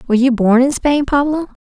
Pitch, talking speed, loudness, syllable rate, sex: 265 Hz, 220 wpm, -14 LUFS, 5.9 syllables/s, female